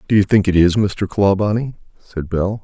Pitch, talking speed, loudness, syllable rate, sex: 100 Hz, 205 wpm, -16 LUFS, 4.9 syllables/s, male